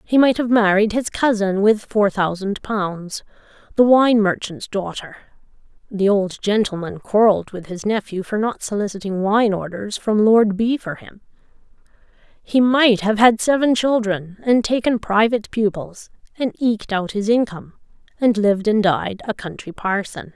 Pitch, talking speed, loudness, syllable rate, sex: 210 Hz, 155 wpm, -18 LUFS, 3.8 syllables/s, female